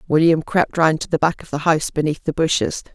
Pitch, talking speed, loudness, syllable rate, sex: 160 Hz, 245 wpm, -19 LUFS, 6.0 syllables/s, female